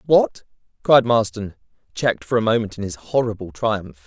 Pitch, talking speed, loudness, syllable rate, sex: 110 Hz, 160 wpm, -20 LUFS, 5.1 syllables/s, male